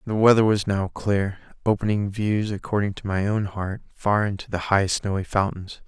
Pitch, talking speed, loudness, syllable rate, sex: 100 Hz, 185 wpm, -23 LUFS, 4.9 syllables/s, male